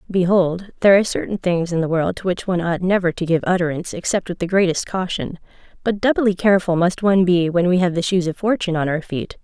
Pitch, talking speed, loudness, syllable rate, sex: 180 Hz, 230 wpm, -19 LUFS, 6.3 syllables/s, female